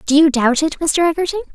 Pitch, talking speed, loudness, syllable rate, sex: 310 Hz, 230 wpm, -16 LUFS, 6.1 syllables/s, female